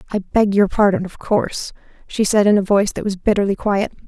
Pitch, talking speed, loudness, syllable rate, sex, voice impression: 200 Hz, 220 wpm, -18 LUFS, 6.0 syllables/s, female, feminine, slightly adult-like, slightly friendly, slightly sweet, slightly kind